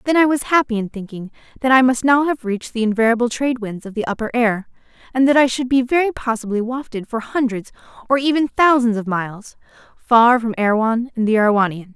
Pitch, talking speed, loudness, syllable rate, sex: 235 Hz, 205 wpm, -18 LUFS, 6.1 syllables/s, female